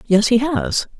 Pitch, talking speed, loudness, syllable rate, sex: 250 Hz, 180 wpm, -17 LUFS, 3.7 syllables/s, female